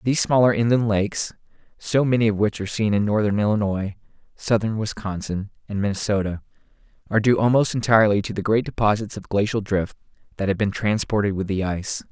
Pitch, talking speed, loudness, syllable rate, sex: 105 Hz, 175 wpm, -22 LUFS, 6.2 syllables/s, male